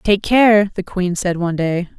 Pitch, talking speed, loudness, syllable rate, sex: 190 Hz, 210 wpm, -16 LUFS, 4.4 syllables/s, female